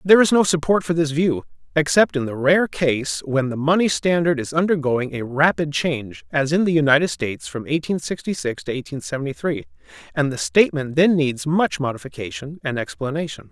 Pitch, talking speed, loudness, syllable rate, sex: 145 Hz, 190 wpm, -20 LUFS, 5.5 syllables/s, male